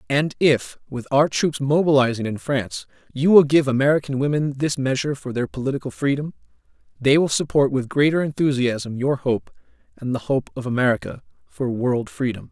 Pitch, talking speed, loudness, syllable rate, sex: 135 Hz, 170 wpm, -21 LUFS, 5.4 syllables/s, male